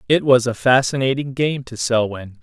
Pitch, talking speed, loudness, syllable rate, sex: 125 Hz, 175 wpm, -18 LUFS, 4.9 syllables/s, male